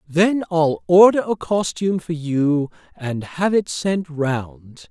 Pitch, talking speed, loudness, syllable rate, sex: 160 Hz, 145 wpm, -19 LUFS, 3.5 syllables/s, male